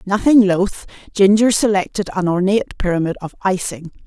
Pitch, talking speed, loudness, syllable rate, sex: 195 Hz, 135 wpm, -16 LUFS, 5.6 syllables/s, female